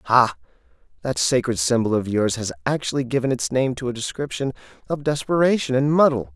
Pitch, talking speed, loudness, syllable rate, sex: 125 Hz, 170 wpm, -21 LUFS, 5.7 syllables/s, male